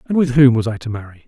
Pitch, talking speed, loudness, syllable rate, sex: 125 Hz, 330 wpm, -15 LUFS, 7.0 syllables/s, male